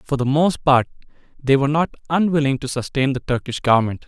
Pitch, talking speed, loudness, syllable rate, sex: 140 Hz, 190 wpm, -19 LUFS, 5.9 syllables/s, male